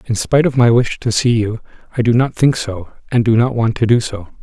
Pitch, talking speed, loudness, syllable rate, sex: 115 Hz, 270 wpm, -15 LUFS, 5.7 syllables/s, male